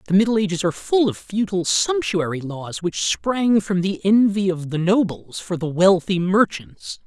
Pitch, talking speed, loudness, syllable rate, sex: 185 Hz, 180 wpm, -20 LUFS, 4.7 syllables/s, male